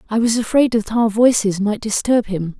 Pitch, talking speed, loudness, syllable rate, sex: 220 Hz, 210 wpm, -17 LUFS, 5.0 syllables/s, female